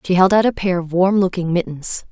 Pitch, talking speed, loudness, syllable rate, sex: 185 Hz, 255 wpm, -17 LUFS, 5.5 syllables/s, female